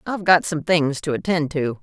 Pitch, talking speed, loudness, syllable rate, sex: 160 Hz, 230 wpm, -20 LUFS, 5.3 syllables/s, female